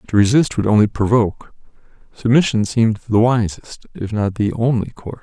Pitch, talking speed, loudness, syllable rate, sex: 110 Hz, 160 wpm, -17 LUFS, 5.4 syllables/s, male